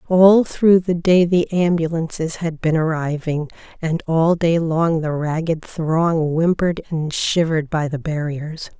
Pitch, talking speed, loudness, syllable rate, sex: 165 Hz, 150 wpm, -18 LUFS, 4.1 syllables/s, female